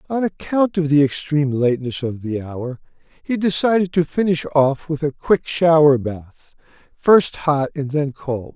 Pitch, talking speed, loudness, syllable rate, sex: 150 Hz, 170 wpm, -19 LUFS, 4.5 syllables/s, male